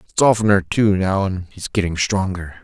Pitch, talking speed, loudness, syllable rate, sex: 95 Hz, 180 wpm, -19 LUFS, 5.0 syllables/s, male